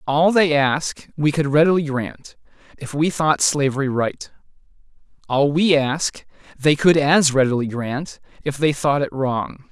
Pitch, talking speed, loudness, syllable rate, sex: 145 Hz, 155 wpm, -19 LUFS, 4.1 syllables/s, male